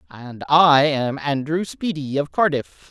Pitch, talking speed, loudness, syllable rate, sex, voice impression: 150 Hz, 145 wpm, -19 LUFS, 3.8 syllables/s, female, masculine, adult-like, thin, tensed, bright, slightly muffled, fluent, intellectual, friendly, unique, lively